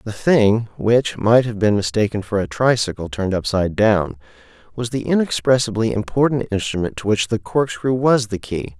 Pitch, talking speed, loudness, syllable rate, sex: 110 Hz, 165 wpm, -19 LUFS, 5.1 syllables/s, male